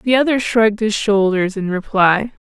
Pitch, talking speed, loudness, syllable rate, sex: 210 Hz, 170 wpm, -16 LUFS, 4.7 syllables/s, female